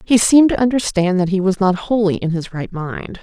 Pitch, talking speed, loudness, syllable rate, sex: 195 Hz, 240 wpm, -16 LUFS, 5.5 syllables/s, female